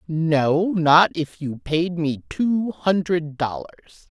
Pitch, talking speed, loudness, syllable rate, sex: 165 Hz, 130 wpm, -21 LUFS, 3.3 syllables/s, female